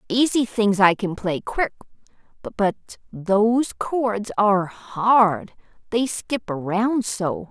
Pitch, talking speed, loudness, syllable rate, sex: 210 Hz, 120 wpm, -21 LUFS, 3.3 syllables/s, female